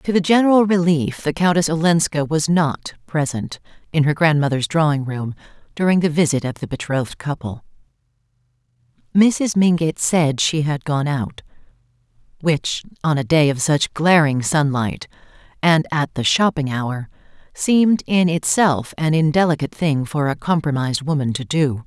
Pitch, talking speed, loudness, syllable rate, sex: 155 Hz, 150 wpm, -18 LUFS, 4.9 syllables/s, female